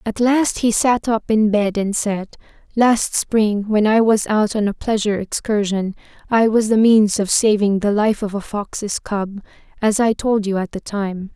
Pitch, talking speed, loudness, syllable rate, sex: 210 Hz, 200 wpm, -18 LUFS, 4.3 syllables/s, female